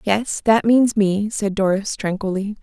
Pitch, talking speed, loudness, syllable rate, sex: 205 Hz, 160 wpm, -19 LUFS, 4.1 syllables/s, female